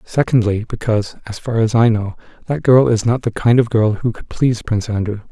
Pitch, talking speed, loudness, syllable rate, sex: 115 Hz, 225 wpm, -16 LUFS, 5.7 syllables/s, male